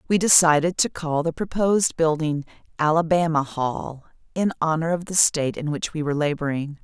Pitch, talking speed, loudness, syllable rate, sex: 160 Hz, 165 wpm, -22 LUFS, 5.4 syllables/s, female